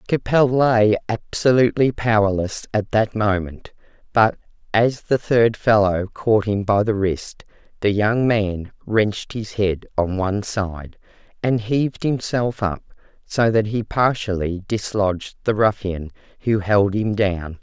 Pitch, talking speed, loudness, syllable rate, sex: 105 Hz, 140 wpm, -20 LUFS, 4.0 syllables/s, female